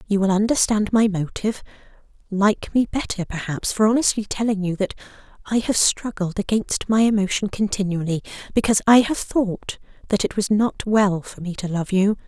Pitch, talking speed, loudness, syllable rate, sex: 205 Hz, 165 wpm, -21 LUFS, 5.2 syllables/s, female